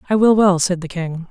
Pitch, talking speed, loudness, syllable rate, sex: 185 Hz, 275 wpm, -16 LUFS, 5.4 syllables/s, female